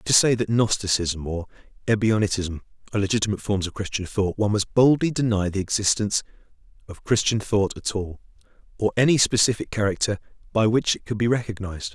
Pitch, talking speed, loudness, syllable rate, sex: 105 Hz, 165 wpm, -23 LUFS, 6.2 syllables/s, male